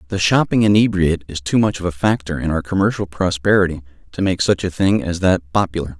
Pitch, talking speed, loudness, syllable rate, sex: 90 Hz, 210 wpm, -18 LUFS, 6.1 syllables/s, male